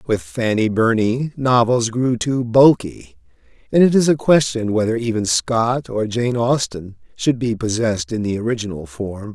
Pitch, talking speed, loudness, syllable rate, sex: 115 Hz, 160 wpm, -18 LUFS, 4.5 syllables/s, male